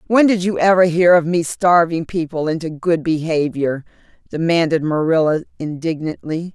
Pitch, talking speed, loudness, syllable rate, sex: 165 Hz, 140 wpm, -17 LUFS, 4.8 syllables/s, female